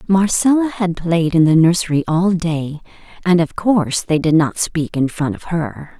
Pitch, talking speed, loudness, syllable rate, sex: 170 Hz, 190 wpm, -16 LUFS, 4.5 syllables/s, female